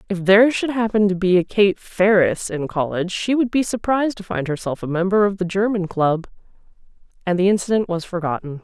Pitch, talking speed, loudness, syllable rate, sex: 195 Hz, 200 wpm, -19 LUFS, 5.8 syllables/s, female